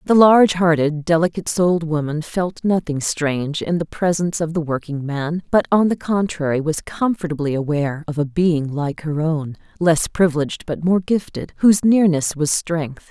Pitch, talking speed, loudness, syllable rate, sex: 165 Hz, 170 wpm, -19 LUFS, 5.1 syllables/s, female